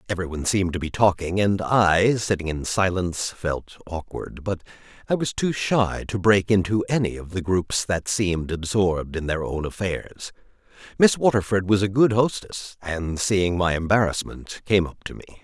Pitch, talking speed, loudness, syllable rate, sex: 95 Hz, 175 wpm, -23 LUFS, 4.8 syllables/s, male